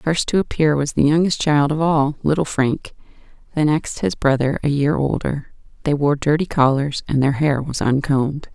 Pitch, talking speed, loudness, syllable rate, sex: 145 Hz, 195 wpm, -19 LUFS, 5.0 syllables/s, female